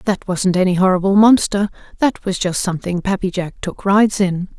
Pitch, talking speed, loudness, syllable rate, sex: 190 Hz, 185 wpm, -17 LUFS, 5.4 syllables/s, female